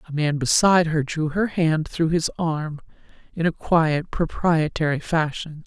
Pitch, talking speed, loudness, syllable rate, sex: 160 Hz, 160 wpm, -22 LUFS, 4.3 syllables/s, female